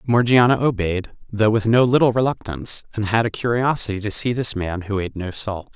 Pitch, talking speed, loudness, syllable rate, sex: 110 Hz, 200 wpm, -20 LUFS, 5.6 syllables/s, male